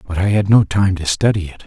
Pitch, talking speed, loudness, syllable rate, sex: 95 Hz, 290 wpm, -16 LUFS, 6.0 syllables/s, male